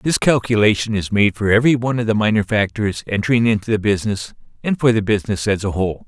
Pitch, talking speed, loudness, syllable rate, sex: 110 Hz, 215 wpm, -18 LUFS, 6.6 syllables/s, male